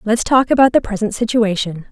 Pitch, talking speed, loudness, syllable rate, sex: 220 Hz, 190 wpm, -15 LUFS, 5.6 syllables/s, female